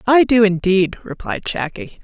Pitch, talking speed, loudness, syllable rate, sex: 210 Hz, 150 wpm, -17 LUFS, 4.4 syllables/s, female